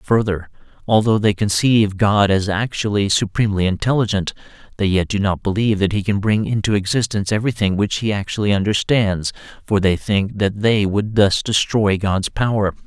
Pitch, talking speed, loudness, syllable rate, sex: 100 Hz, 165 wpm, -18 LUFS, 5.4 syllables/s, male